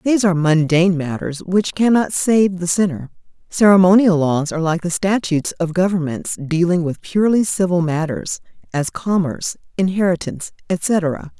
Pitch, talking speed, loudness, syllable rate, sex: 175 Hz, 135 wpm, -17 LUFS, 5.1 syllables/s, female